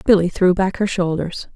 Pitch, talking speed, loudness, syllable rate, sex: 185 Hz, 195 wpm, -18 LUFS, 5.0 syllables/s, female